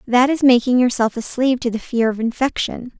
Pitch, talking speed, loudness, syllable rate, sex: 245 Hz, 220 wpm, -18 LUFS, 5.7 syllables/s, female